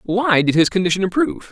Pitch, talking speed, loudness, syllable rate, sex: 195 Hz, 200 wpm, -17 LUFS, 6.4 syllables/s, male